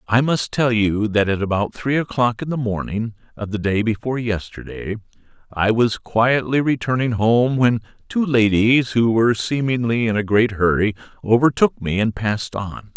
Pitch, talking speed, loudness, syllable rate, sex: 115 Hz, 170 wpm, -19 LUFS, 4.8 syllables/s, male